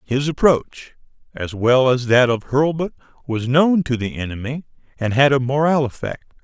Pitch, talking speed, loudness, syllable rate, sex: 130 Hz, 170 wpm, -18 LUFS, 4.7 syllables/s, male